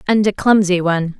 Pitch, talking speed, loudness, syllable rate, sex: 190 Hz, 200 wpm, -15 LUFS, 5.8 syllables/s, female